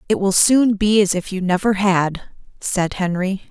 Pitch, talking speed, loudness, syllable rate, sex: 195 Hz, 190 wpm, -17 LUFS, 4.5 syllables/s, female